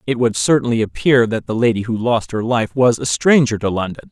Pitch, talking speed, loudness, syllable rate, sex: 120 Hz, 235 wpm, -16 LUFS, 5.5 syllables/s, male